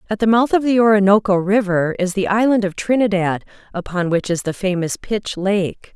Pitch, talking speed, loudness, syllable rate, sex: 200 Hz, 190 wpm, -17 LUFS, 5.2 syllables/s, female